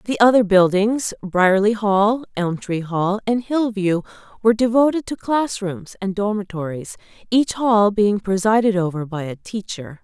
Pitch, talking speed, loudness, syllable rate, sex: 205 Hz, 145 wpm, -19 LUFS, 4.4 syllables/s, female